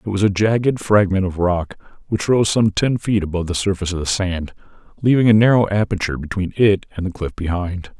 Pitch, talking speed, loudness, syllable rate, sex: 100 Hz, 210 wpm, -18 LUFS, 5.9 syllables/s, male